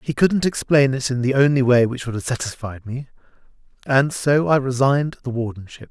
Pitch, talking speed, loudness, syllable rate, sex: 130 Hz, 195 wpm, -19 LUFS, 5.5 syllables/s, male